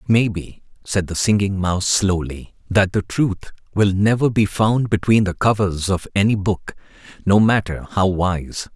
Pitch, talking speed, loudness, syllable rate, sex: 100 Hz, 170 wpm, -19 LUFS, 4.4 syllables/s, male